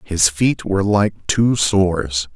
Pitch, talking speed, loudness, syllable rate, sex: 95 Hz, 155 wpm, -17 LUFS, 3.6 syllables/s, male